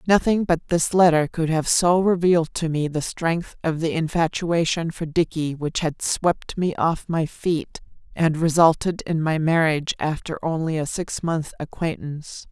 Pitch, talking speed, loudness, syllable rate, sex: 165 Hz, 170 wpm, -22 LUFS, 4.4 syllables/s, female